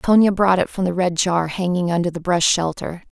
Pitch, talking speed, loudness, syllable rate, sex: 180 Hz, 230 wpm, -19 LUFS, 5.3 syllables/s, female